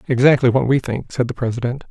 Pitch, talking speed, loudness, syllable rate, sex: 125 Hz, 220 wpm, -18 LUFS, 6.5 syllables/s, male